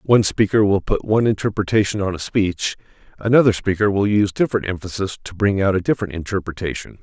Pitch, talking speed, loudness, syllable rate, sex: 100 Hz, 180 wpm, -19 LUFS, 6.5 syllables/s, male